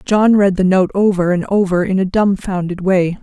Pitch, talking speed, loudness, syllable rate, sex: 190 Hz, 205 wpm, -15 LUFS, 4.9 syllables/s, female